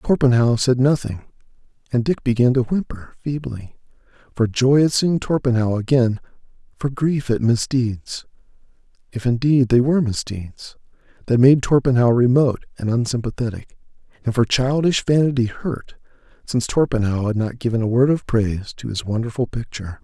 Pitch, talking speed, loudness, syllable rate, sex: 125 Hz, 140 wpm, -19 LUFS, 5.2 syllables/s, male